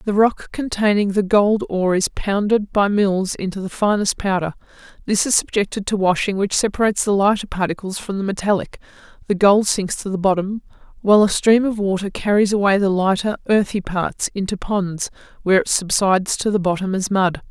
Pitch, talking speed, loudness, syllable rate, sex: 200 Hz, 185 wpm, -19 LUFS, 5.5 syllables/s, female